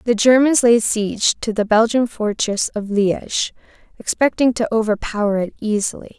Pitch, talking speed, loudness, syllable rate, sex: 220 Hz, 145 wpm, -18 LUFS, 4.9 syllables/s, female